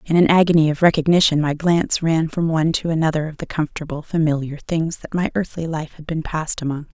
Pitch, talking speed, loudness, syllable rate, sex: 160 Hz, 215 wpm, -19 LUFS, 6.4 syllables/s, female